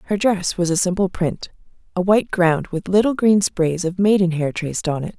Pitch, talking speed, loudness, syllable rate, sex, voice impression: 185 Hz, 220 wpm, -19 LUFS, 5.3 syllables/s, female, feminine, adult-like, relaxed, slightly bright, soft, slightly raspy, slightly intellectual, calm, friendly, reassuring, elegant, kind, modest